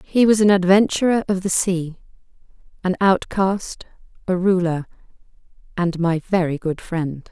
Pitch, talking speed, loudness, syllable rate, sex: 185 Hz, 125 wpm, -19 LUFS, 4.4 syllables/s, female